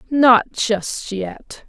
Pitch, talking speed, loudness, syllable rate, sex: 225 Hz, 105 wpm, -17 LUFS, 2.0 syllables/s, female